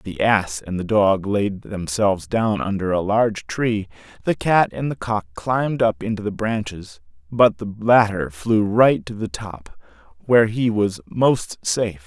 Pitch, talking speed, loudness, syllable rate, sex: 105 Hz, 175 wpm, -20 LUFS, 4.2 syllables/s, male